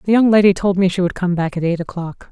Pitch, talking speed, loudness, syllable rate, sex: 185 Hz, 310 wpm, -16 LUFS, 6.5 syllables/s, female